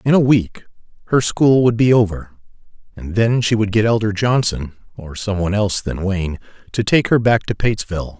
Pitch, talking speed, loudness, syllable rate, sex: 105 Hz, 200 wpm, -17 LUFS, 5.5 syllables/s, male